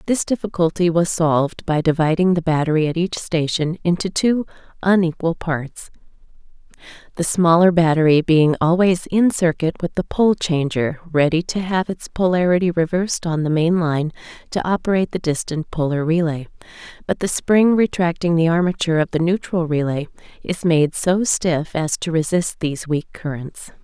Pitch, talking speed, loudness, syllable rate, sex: 170 Hz, 155 wpm, -19 LUFS, 5.0 syllables/s, female